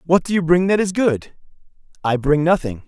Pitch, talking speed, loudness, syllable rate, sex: 165 Hz, 210 wpm, -18 LUFS, 5.2 syllables/s, male